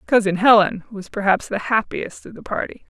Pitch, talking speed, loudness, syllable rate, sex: 210 Hz, 180 wpm, -19 LUFS, 5.2 syllables/s, female